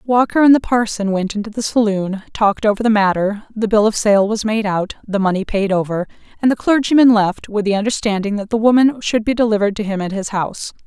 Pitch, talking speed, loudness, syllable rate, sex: 215 Hz, 225 wpm, -16 LUFS, 5.9 syllables/s, female